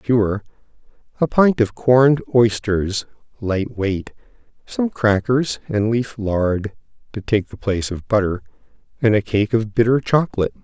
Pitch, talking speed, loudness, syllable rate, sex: 110 Hz, 140 wpm, -19 LUFS, 4.7 syllables/s, male